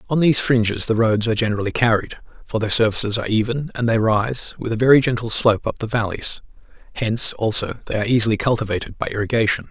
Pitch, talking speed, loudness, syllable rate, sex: 115 Hz, 200 wpm, -19 LUFS, 6.8 syllables/s, male